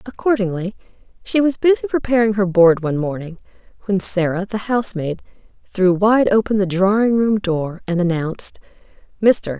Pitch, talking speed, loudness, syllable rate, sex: 200 Hz, 145 wpm, -17 LUFS, 4.6 syllables/s, female